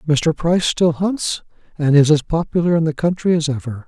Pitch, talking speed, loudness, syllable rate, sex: 160 Hz, 200 wpm, -17 LUFS, 5.3 syllables/s, male